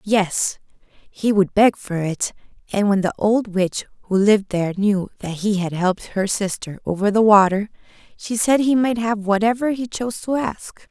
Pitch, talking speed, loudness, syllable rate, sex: 205 Hz, 185 wpm, -19 LUFS, 4.7 syllables/s, female